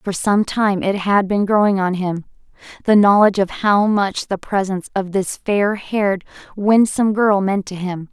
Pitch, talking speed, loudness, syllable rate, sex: 200 Hz, 175 wpm, -17 LUFS, 4.6 syllables/s, female